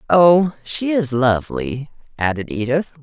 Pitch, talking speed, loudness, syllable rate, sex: 140 Hz, 120 wpm, -18 LUFS, 4.3 syllables/s, female